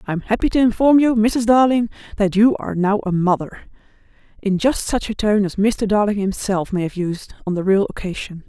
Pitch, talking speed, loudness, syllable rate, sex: 210 Hz, 210 wpm, -18 LUFS, 5.5 syllables/s, female